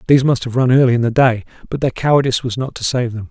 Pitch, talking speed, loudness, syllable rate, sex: 125 Hz, 290 wpm, -16 LUFS, 7.3 syllables/s, male